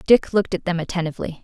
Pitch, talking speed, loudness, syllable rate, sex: 180 Hz, 210 wpm, -21 LUFS, 7.8 syllables/s, female